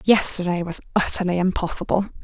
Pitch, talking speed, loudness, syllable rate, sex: 185 Hz, 110 wpm, -22 LUFS, 5.9 syllables/s, female